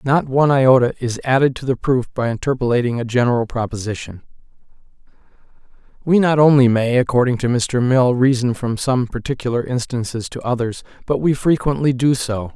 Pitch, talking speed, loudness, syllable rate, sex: 125 Hz, 160 wpm, -17 LUFS, 5.6 syllables/s, male